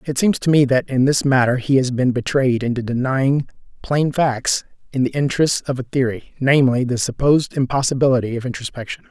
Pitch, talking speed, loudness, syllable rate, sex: 130 Hz, 185 wpm, -18 LUFS, 5.7 syllables/s, male